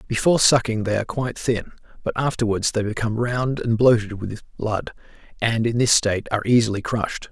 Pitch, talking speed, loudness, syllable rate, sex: 115 Hz, 180 wpm, -21 LUFS, 6.0 syllables/s, male